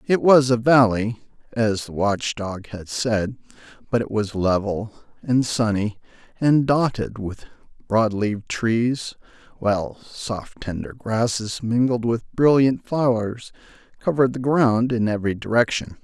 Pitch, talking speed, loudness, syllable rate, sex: 115 Hz, 135 wpm, -21 LUFS, 4.1 syllables/s, male